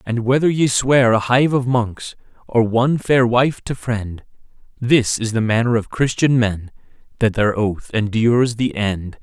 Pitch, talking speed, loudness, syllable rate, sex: 120 Hz, 175 wpm, -17 LUFS, 4.2 syllables/s, male